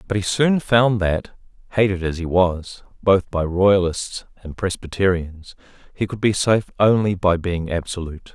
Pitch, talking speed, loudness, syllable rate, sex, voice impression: 95 Hz, 160 wpm, -20 LUFS, 4.5 syllables/s, male, masculine, adult-like, cool, intellectual, slightly calm